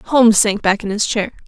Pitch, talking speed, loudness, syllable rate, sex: 210 Hz, 245 wpm, -15 LUFS, 5.4 syllables/s, female